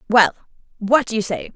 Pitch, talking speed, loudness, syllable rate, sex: 220 Hz, 195 wpm, -18 LUFS, 5.7 syllables/s, female